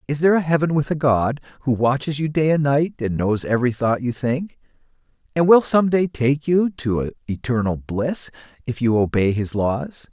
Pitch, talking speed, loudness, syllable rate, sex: 135 Hz, 195 wpm, -20 LUFS, 4.8 syllables/s, male